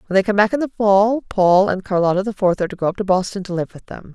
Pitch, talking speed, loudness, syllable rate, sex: 195 Hz, 320 wpm, -18 LUFS, 6.6 syllables/s, female